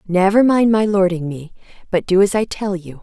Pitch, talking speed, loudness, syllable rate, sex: 190 Hz, 220 wpm, -16 LUFS, 5.2 syllables/s, female